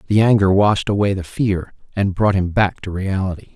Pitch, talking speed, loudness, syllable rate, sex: 100 Hz, 205 wpm, -18 LUFS, 5.0 syllables/s, male